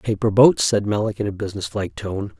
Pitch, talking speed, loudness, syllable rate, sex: 105 Hz, 225 wpm, -20 LUFS, 5.6 syllables/s, male